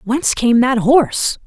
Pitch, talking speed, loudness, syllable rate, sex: 245 Hz, 165 wpm, -14 LUFS, 4.6 syllables/s, female